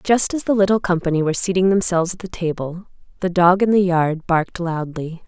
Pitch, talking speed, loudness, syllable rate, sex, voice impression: 180 Hz, 205 wpm, -19 LUFS, 5.7 syllables/s, female, feminine, adult-like, slightly cute, slightly intellectual, calm, slightly sweet